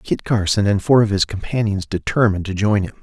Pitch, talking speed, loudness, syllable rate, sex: 100 Hz, 220 wpm, -18 LUFS, 5.9 syllables/s, male